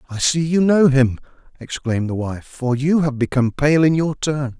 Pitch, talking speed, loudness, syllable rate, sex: 140 Hz, 210 wpm, -18 LUFS, 5.0 syllables/s, male